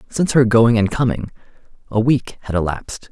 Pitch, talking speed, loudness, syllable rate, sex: 115 Hz, 175 wpm, -17 LUFS, 5.8 syllables/s, male